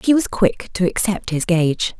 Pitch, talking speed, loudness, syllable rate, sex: 190 Hz, 210 wpm, -19 LUFS, 4.4 syllables/s, female